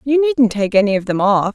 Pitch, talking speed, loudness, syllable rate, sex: 225 Hz, 270 wpm, -15 LUFS, 5.7 syllables/s, female